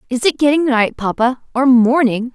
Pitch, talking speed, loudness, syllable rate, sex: 255 Hz, 180 wpm, -15 LUFS, 4.9 syllables/s, female